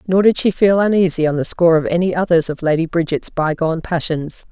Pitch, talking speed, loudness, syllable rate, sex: 170 Hz, 215 wpm, -16 LUFS, 6.0 syllables/s, female